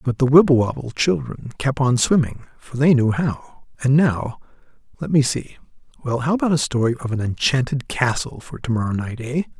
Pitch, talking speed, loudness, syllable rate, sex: 130 Hz, 190 wpm, -20 LUFS, 5.3 syllables/s, male